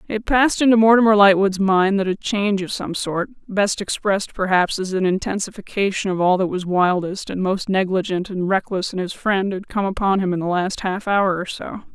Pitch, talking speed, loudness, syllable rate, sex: 195 Hz, 210 wpm, -19 LUFS, 5.3 syllables/s, female